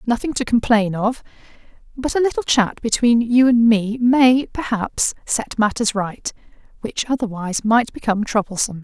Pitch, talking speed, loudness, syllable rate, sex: 230 Hz, 150 wpm, -18 LUFS, 4.9 syllables/s, female